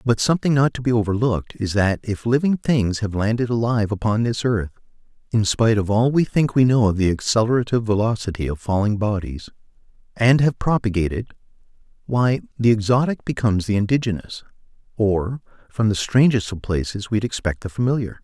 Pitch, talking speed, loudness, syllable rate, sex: 110 Hz, 160 wpm, -20 LUFS, 5.8 syllables/s, male